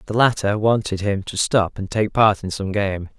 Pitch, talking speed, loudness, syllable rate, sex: 105 Hz, 225 wpm, -20 LUFS, 4.7 syllables/s, male